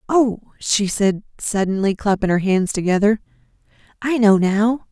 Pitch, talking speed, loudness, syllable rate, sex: 205 Hz, 135 wpm, -19 LUFS, 4.4 syllables/s, female